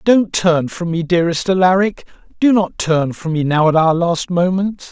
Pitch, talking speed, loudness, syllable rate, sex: 175 Hz, 195 wpm, -16 LUFS, 4.7 syllables/s, male